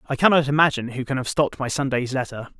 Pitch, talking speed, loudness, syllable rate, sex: 135 Hz, 230 wpm, -22 LUFS, 7.0 syllables/s, male